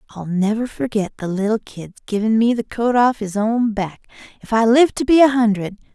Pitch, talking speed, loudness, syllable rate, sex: 220 Hz, 210 wpm, -18 LUFS, 5.1 syllables/s, female